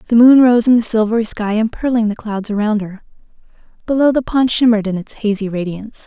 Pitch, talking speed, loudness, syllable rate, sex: 220 Hz, 200 wpm, -15 LUFS, 6.2 syllables/s, female